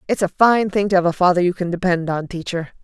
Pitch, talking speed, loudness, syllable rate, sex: 180 Hz, 275 wpm, -18 LUFS, 6.3 syllables/s, female